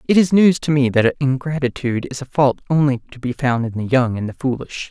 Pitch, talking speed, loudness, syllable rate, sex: 135 Hz, 245 wpm, -18 LUFS, 5.8 syllables/s, male